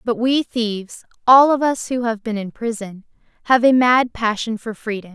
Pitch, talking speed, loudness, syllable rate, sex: 230 Hz, 200 wpm, -18 LUFS, 4.8 syllables/s, female